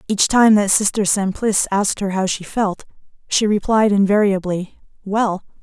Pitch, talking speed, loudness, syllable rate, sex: 200 Hz, 150 wpm, -17 LUFS, 4.9 syllables/s, female